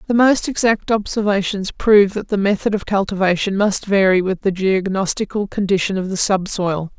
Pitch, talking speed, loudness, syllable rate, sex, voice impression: 195 Hz, 165 wpm, -17 LUFS, 5.2 syllables/s, female, feminine, slightly adult-like, slightly halting, slightly calm, slightly sweet